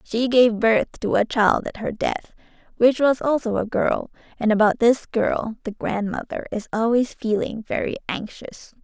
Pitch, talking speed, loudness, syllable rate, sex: 225 Hz, 170 wpm, -21 LUFS, 4.6 syllables/s, female